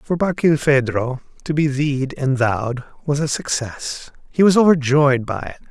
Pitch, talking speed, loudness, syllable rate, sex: 140 Hz, 160 wpm, -19 LUFS, 4.6 syllables/s, male